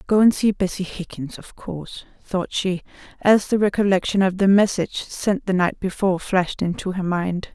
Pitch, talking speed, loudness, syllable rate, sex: 190 Hz, 185 wpm, -21 LUFS, 5.1 syllables/s, female